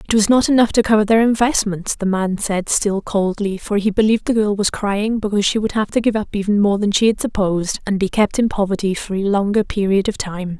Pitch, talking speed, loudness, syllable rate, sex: 205 Hz, 250 wpm, -17 LUFS, 5.8 syllables/s, female